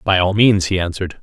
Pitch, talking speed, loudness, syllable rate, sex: 95 Hz, 245 wpm, -16 LUFS, 6.2 syllables/s, male